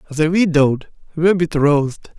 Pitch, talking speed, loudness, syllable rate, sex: 155 Hz, 110 wpm, -17 LUFS, 5.2 syllables/s, male